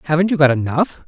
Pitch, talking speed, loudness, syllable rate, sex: 155 Hz, 220 wpm, -16 LUFS, 6.2 syllables/s, male